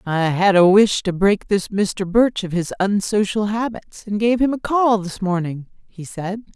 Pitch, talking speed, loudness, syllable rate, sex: 200 Hz, 200 wpm, -19 LUFS, 4.3 syllables/s, female